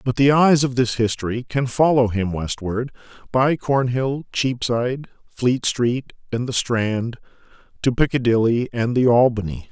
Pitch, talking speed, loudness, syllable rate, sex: 120 Hz, 140 wpm, -20 LUFS, 4.3 syllables/s, male